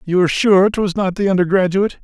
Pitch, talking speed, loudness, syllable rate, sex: 190 Hz, 205 wpm, -15 LUFS, 6.3 syllables/s, male